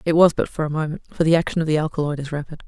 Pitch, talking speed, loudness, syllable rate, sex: 155 Hz, 315 wpm, -21 LUFS, 7.8 syllables/s, female